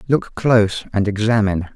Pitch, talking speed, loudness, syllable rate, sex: 105 Hz, 135 wpm, -18 LUFS, 5.4 syllables/s, male